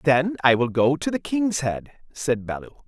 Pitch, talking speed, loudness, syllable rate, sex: 145 Hz, 210 wpm, -23 LUFS, 4.7 syllables/s, male